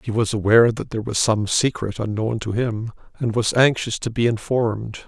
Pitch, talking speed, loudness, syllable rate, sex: 110 Hz, 200 wpm, -21 LUFS, 5.4 syllables/s, male